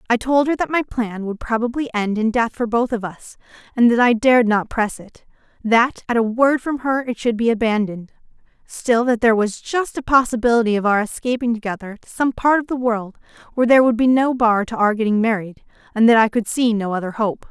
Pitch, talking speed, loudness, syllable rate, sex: 230 Hz, 225 wpm, -18 LUFS, 5.7 syllables/s, female